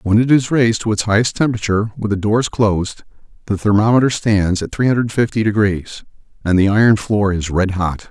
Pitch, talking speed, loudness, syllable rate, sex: 105 Hz, 200 wpm, -16 LUFS, 5.8 syllables/s, male